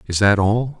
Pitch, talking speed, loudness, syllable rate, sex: 105 Hz, 225 wpm, -17 LUFS, 4.6 syllables/s, male